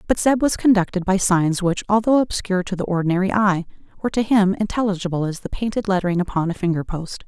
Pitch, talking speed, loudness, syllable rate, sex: 190 Hz, 205 wpm, -20 LUFS, 6.4 syllables/s, female